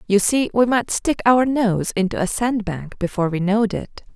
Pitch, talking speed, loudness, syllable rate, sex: 215 Hz, 200 wpm, -19 LUFS, 5.0 syllables/s, female